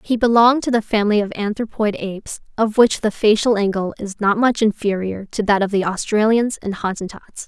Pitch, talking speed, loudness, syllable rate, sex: 210 Hz, 195 wpm, -18 LUFS, 5.4 syllables/s, female